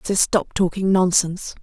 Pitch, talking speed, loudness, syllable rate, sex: 185 Hz, 145 wpm, -19 LUFS, 4.8 syllables/s, female